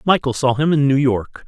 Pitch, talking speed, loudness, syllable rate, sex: 135 Hz, 245 wpm, -17 LUFS, 5.2 syllables/s, male